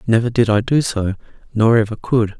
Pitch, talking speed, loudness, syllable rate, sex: 115 Hz, 200 wpm, -17 LUFS, 5.6 syllables/s, male